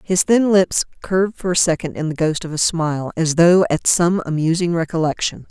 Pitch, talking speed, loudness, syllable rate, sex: 170 Hz, 205 wpm, -17 LUFS, 5.3 syllables/s, female